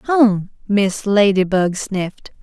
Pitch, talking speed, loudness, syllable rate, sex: 200 Hz, 100 wpm, -17 LUFS, 3.4 syllables/s, female